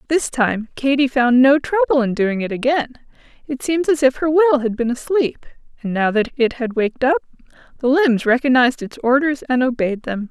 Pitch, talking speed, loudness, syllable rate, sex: 260 Hz, 200 wpm, -17 LUFS, 5.2 syllables/s, female